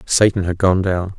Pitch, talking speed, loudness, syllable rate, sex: 95 Hz, 205 wpm, -17 LUFS, 4.6 syllables/s, male